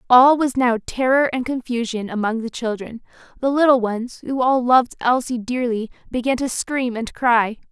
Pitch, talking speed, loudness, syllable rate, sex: 245 Hz, 170 wpm, -19 LUFS, 4.8 syllables/s, female